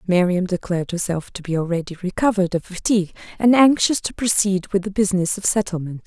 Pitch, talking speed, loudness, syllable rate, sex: 190 Hz, 180 wpm, -20 LUFS, 6.3 syllables/s, female